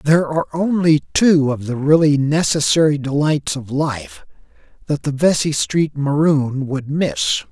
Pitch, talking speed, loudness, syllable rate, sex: 150 Hz, 145 wpm, -17 LUFS, 4.2 syllables/s, male